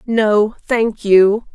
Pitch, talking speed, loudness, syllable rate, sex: 215 Hz, 115 wpm, -15 LUFS, 2.3 syllables/s, female